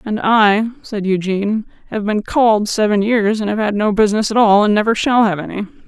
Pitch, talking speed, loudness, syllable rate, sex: 210 Hz, 215 wpm, -15 LUFS, 5.6 syllables/s, female